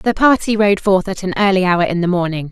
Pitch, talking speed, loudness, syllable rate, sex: 190 Hz, 260 wpm, -15 LUFS, 5.7 syllables/s, female